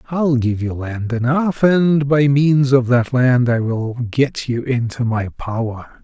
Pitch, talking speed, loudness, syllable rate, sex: 125 Hz, 180 wpm, -17 LUFS, 3.6 syllables/s, male